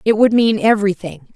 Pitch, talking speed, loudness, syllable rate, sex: 205 Hz, 175 wpm, -14 LUFS, 6.1 syllables/s, female